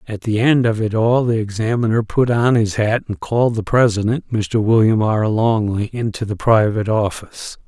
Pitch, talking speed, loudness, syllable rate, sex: 110 Hz, 190 wpm, -17 LUFS, 5.0 syllables/s, male